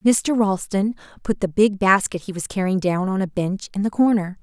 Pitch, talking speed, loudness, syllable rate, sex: 195 Hz, 215 wpm, -21 LUFS, 4.9 syllables/s, female